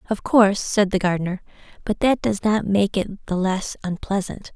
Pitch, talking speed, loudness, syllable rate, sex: 200 Hz, 185 wpm, -21 LUFS, 4.9 syllables/s, female